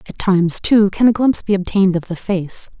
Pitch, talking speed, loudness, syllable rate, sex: 195 Hz, 235 wpm, -16 LUFS, 5.9 syllables/s, female